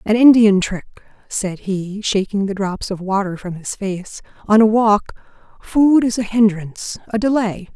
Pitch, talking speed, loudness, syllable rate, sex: 205 Hz, 170 wpm, -17 LUFS, 4.4 syllables/s, female